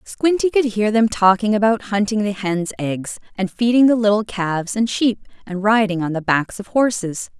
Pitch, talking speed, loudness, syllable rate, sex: 210 Hz, 195 wpm, -18 LUFS, 4.9 syllables/s, female